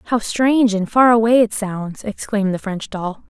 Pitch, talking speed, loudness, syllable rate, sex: 215 Hz, 195 wpm, -18 LUFS, 4.9 syllables/s, female